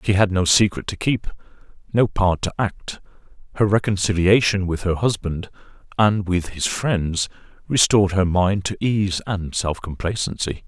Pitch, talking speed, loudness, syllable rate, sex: 95 Hz, 145 wpm, -20 LUFS, 4.5 syllables/s, male